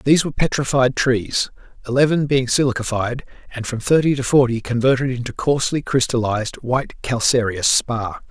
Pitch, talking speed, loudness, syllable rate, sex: 125 Hz, 135 wpm, -19 LUFS, 5.5 syllables/s, male